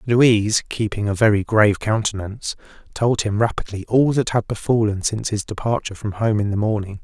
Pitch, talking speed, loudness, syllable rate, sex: 105 Hz, 180 wpm, -20 LUFS, 5.8 syllables/s, male